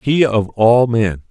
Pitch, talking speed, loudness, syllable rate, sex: 115 Hz, 140 wpm, -14 LUFS, 3.6 syllables/s, male